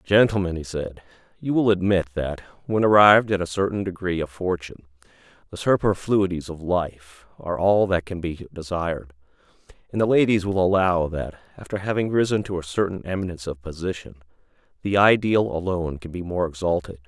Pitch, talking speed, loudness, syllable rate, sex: 90 Hz, 165 wpm, -22 LUFS, 5.6 syllables/s, male